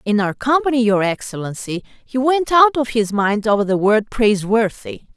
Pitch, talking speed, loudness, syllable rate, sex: 225 Hz, 175 wpm, -17 LUFS, 5.0 syllables/s, female